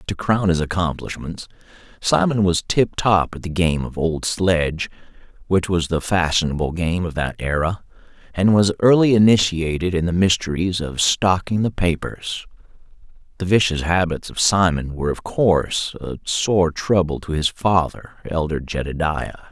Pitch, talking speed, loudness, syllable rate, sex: 85 Hz, 150 wpm, -20 LUFS, 4.6 syllables/s, male